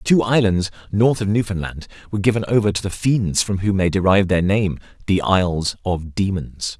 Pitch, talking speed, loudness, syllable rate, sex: 100 Hz, 185 wpm, -19 LUFS, 5.3 syllables/s, male